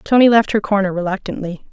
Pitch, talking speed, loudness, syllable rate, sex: 200 Hz, 175 wpm, -16 LUFS, 6.1 syllables/s, female